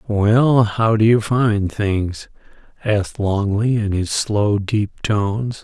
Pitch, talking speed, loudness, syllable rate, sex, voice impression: 105 Hz, 140 wpm, -18 LUFS, 3.3 syllables/s, male, very masculine, very adult-like, slightly old, very thick, slightly tensed, powerful, slightly bright, slightly hard, muffled, slightly fluent, raspy, very cool, intellectual, very sincere, very calm, very mature, friendly, reassuring, unique, elegant, wild, sweet, slightly lively, slightly strict, slightly modest